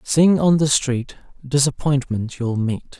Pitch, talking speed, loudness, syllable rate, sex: 135 Hz, 140 wpm, -19 LUFS, 3.8 syllables/s, male